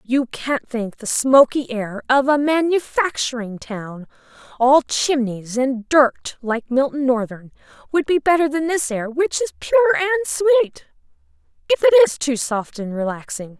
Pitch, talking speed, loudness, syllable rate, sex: 275 Hz, 155 wpm, -19 LUFS, 4.4 syllables/s, female